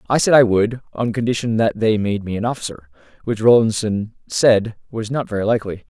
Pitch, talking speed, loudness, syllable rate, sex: 110 Hz, 190 wpm, -18 LUFS, 5.6 syllables/s, male